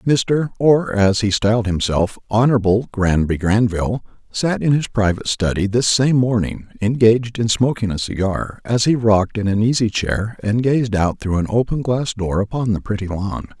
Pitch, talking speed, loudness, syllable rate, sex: 110 Hz, 170 wpm, -18 LUFS, 4.8 syllables/s, male